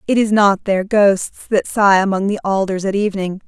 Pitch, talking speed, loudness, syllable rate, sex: 200 Hz, 205 wpm, -16 LUFS, 5.3 syllables/s, female